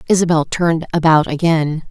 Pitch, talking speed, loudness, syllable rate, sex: 160 Hz, 125 wpm, -15 LUFS, 5.6 syllables/s, female